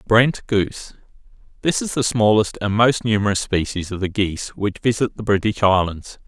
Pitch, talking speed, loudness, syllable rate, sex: 105 Hz, 170 wpm, -19 LUFS, 5.2 syllables/s, male